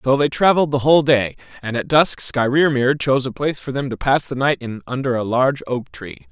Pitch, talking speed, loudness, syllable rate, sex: 135 Hz, 235 wpm, -18 LUFS, 5.7 syllables/s, male